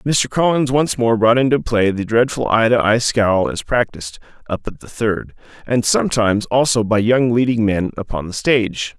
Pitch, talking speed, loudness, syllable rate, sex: 115 Hz, 195 wpm, -17 LUFS, 5.0 syllables/s, male